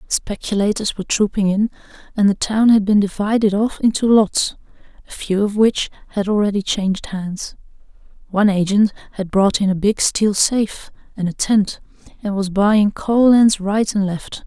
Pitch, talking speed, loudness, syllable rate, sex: 205 Hz, 165 wpm, -17 LUFS, 4.8 syllables/s, female